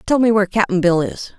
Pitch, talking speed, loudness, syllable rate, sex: 210 Hz, 260 wpm, -17 LUFS, 5.7 syllables/s, female